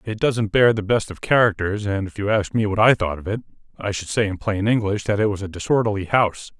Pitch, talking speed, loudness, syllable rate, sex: 105 Hz, 265 wpm, -21 LUFS, 6.1 syllables/s, male